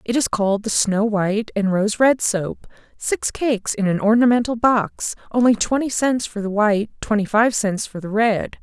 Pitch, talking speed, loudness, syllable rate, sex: 220 Hz, 195 wpm, -19 LUFS, 4.8 syllables/s, female